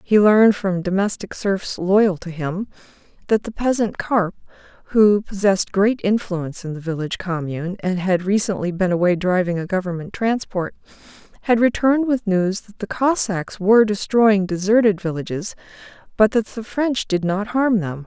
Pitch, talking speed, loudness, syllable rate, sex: 200 Hz, 160 wpm, -19 LUFS, 4.9 syllables/s, female